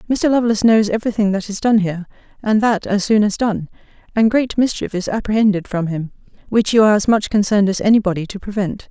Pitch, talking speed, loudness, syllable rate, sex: 210 Hz, 220 wpm, -17 LUFS, 6.5 syllables/s, female